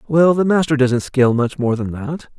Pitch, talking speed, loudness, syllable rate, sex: 140 Hz, 225 wpm, -17 LUFS, 5.1 syllables/s, male